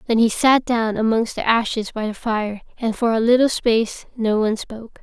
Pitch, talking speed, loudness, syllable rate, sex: 225 Hz, 215 wpm, -19 LUFS, 5.2 syllables/s, female